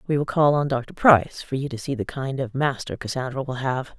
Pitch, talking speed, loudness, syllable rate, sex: 135 Hz, 255 wpm, -23 LUFS, 5.5 syllables/s, female